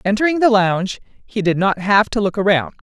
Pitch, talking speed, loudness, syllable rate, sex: 205 Hz, 210 wpm, -17 LUFS, 5.5 syllables/s, female